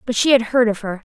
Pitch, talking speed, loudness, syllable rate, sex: 230 Hz, 325 wpm, -17 LUFS, 6.5 syllables/s, female